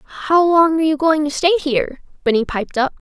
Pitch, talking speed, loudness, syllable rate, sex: 300 Hz, 195 wpm, -16 LUFS, 5.9 syllables/s, female